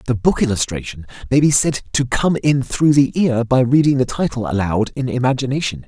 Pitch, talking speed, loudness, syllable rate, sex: 130 Hz, 195 wpm, -17 LUFS, 5.5 syllables/s, male